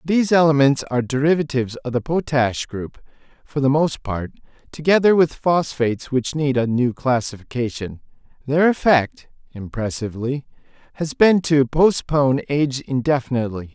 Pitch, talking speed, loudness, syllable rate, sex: 135 Hz, 125 wpm, -19 LUFS, 5.1 syllables/s, male